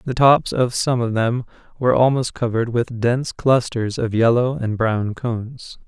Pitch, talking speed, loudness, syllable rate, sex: 120 Hz, 175 wpm, -19 LUFS, 4.7 syllables/s, male